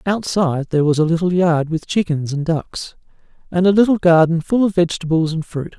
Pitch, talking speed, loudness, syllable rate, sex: 170 Hz, 195 wpm, -17 LUFS, 5.7 syllables/s, male